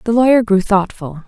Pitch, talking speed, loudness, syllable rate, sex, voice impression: 210 Hz, 190 wpm, -13 LUFS, 5.3 syllables/s, female, feminine, adult-like, slightly thin, slightly weak, soft, clear, fluent, intellectual, calm, friendly, reassuring, elegant, kind, modest